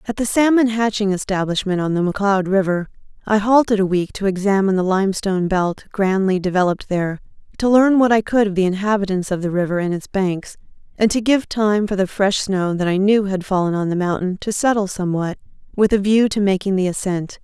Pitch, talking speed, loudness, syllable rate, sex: 195 Hz, 210 wpm, -18 LUFS, 5.9 syllables/s, female